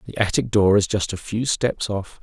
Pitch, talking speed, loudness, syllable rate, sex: 100 Hz, 245 wpm, -21 LUFS, 4.8 syllables/s, male